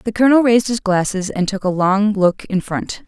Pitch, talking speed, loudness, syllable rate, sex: 205 Hz, 235 wpm, -17 LUFS, 5.3 syllables/s, female